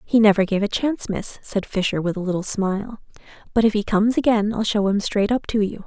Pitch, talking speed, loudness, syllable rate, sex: 210 Hz, 245 wpm, -21 LUFS, 6.0 syllables/s, female